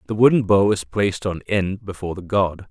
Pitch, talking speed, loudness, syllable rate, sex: 100 Hz, 220 wpm, -20 LUFS, 5.7 syllables/s, male